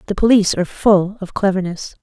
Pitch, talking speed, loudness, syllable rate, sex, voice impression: 195 Hz, 180 wpm, -16 LUFS, 6.2 syllables/s, female, feminine, adult-like, sincere, friendly